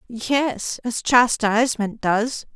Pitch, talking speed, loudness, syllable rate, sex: 235 Hz, 95 wpm, -20 LUFS, 3.1 syllables/s, female